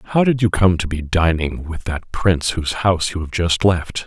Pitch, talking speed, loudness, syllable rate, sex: 90 Hz, 235 wpm, -19 LUFS, 5.0 syllables/s, male